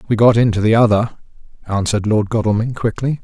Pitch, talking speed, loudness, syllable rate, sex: 110 Hz, 165 wpm, -16 LUFS, 6.2 syllables/s, male